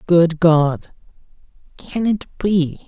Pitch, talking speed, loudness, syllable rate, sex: 170 Hz, 105 wpm, -17 LUFS, 2.9 syllables/s, male